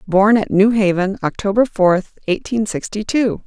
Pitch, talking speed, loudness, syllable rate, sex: 205 Hz, 155 wpm, -17 LUFS, 4.4 syllables/s, female